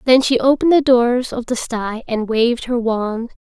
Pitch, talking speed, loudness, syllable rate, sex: 240 Hz, 210 wpm, -17 LUFS, 4.8 syllables/s, female